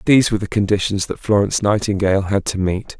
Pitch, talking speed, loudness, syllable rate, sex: 100 Hz, 200 wpm, -18 LUFS, 6.7 syllables/s, male